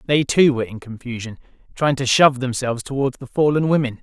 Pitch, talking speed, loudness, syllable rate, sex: 130 Hz, 195 wpm, -19 LUFS, 6.3 syllables/s, male